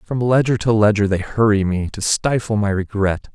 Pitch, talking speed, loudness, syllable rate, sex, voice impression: 105 Hz, 200 wpm, -18 LUFS, 4.9 syllables/s, male, very masculine, very middle-aged, thick, tensed, slightly powerful, bright, slightly soft, clear, fluent, cool, intellectual, refreshing, slightly sincere, calm, friendly, reassuring, unique, elegant, wild, very sweet, lively, kind, slightly modest